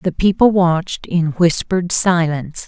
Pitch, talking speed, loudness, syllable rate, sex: 175 Hz, 135 wpm, -16 LUFS, 4.6 syllables/s, female